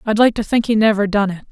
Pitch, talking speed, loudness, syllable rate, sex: 210 Hz, 315 wpm, -16 LUFS, 6.7 syllables/s, female